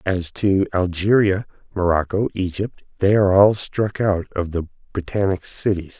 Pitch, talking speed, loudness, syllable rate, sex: 95 Hz, 130 wpm, -20 LUFS, 4.5 syllables/s, male